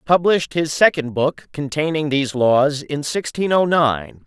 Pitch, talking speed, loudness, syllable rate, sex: 150 Hz, 155 wpm, -18 LUFS, 4.4 syllables/s, male